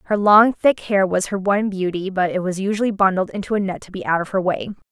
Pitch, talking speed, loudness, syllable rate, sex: 195 Hz, 270 wpm, -19 LUFS, 6.2 syllables/s, female